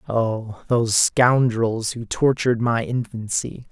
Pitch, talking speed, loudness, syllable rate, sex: 115 Hz, 115 wpm, -21 LUFS, 3.7 syllables/s, male